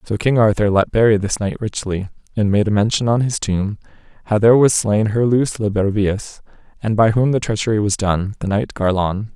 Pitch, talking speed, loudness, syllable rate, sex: 105 Hz, 205 wpm, -17 LUFS, 5.3 syllables/s, male